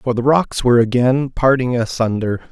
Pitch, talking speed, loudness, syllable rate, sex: 125 Hz, 165 wpm, -16 LUFS, 5.0 syllables/s, male